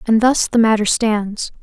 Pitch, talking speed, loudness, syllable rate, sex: 220 Hz, 185 wpm, -16 LUFS, 4.3 syllables/s, female